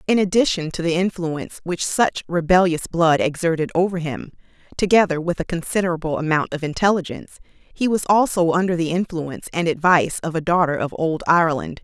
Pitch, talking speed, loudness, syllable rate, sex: 170 Hz, 165 wpm, -20 LUFS, 5.8 syllables/s, female